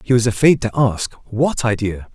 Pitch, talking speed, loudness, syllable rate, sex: 115 Hz, 195 wpm, -18 LUFS, 5.0 syllables/s, male